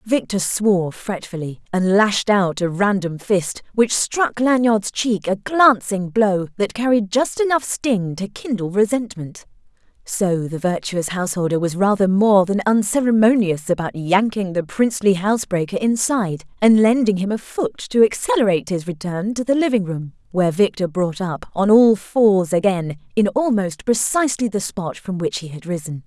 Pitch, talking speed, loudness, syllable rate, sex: 200 Hz, 160 wpm, -19 LUFS, 4.7 syllables/s, female